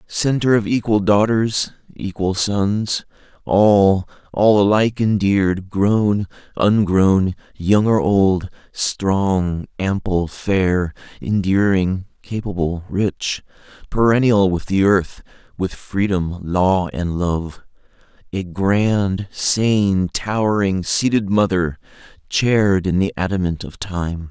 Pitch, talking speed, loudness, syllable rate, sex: 100 Hz, 105 wpm, -18 LUFS, 3.2 syllables/s, male